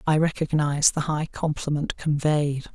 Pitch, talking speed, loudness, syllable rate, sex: 150 Hz, 130 wpm, -24 LUFS, 4.7 syllables/s, male